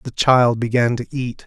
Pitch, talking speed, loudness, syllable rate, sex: 120 Hz, 205 wpm, -18 LUFS, 4.6 syllables/s, male